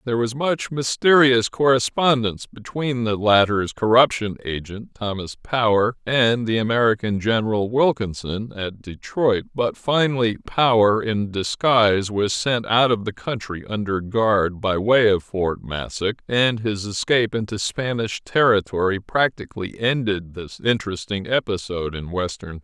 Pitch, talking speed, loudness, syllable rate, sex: 110 Hz, 135 wpm, -21 LUFS, 4.6 syllables/s, male